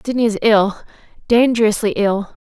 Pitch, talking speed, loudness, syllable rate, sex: 215 Hz, 100 wpm, -16 LUFS, 5.1 syllables/s, female